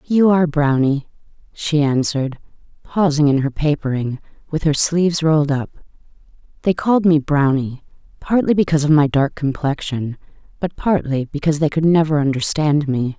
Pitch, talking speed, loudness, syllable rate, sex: 150 Hz, 140 wpm, -18 LUFS, 5.2 syllables/s, female